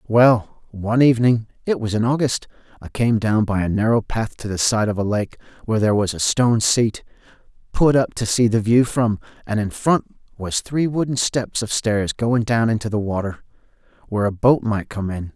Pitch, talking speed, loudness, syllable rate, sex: 110 Hz, 200 wpm, -20 LUFS, 5.2 syllables/s, male